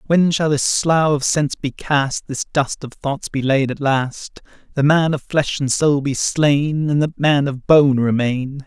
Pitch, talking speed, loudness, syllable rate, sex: 140 Hz, 210 wpm, -18 LUFS, 4.0 syllables/s, male